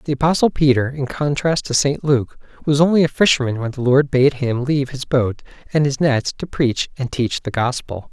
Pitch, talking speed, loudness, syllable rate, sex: 135 Hz, 215 wpm, -18 LUFS, 5.1 syllables/s, male